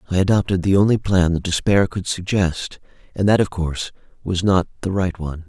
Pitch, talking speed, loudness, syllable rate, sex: 90 Hz, 195 wpm, -19 LUFS, 5.6 syllables/s, male